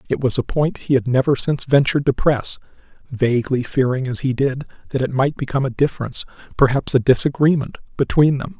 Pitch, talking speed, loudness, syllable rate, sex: 135 Hz, 190 wpm, -19 LUFS, 6.2 syllables/s, male